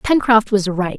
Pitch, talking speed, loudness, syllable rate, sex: 215 Hz, 180 wpm, -16 LUFS, 4.2 syllables/s, female